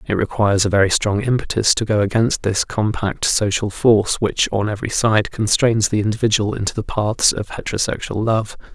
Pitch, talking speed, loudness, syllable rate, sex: 105 Hz, 180 wpm, -18 LUFS, 5.5 syllables/s, male